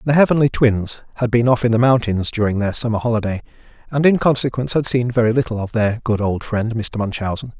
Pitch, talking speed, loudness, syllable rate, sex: 115 Hz, 215 wpm, -18 LUFS, 6.1 syllables/s, male